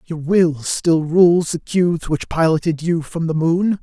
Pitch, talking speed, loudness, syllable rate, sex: 165 Hz, 190 wpm, -17 LUFS, 4.1 syllables/s, male